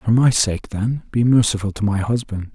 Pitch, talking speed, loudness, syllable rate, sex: 110 Hz, 210 wpm, -19 LUFS, 4.9 syllables/s, male